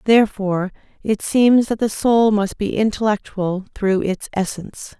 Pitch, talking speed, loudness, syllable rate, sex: 205 Hz, 145 wpm, -19 LUFS, 4.6 syllables/s, female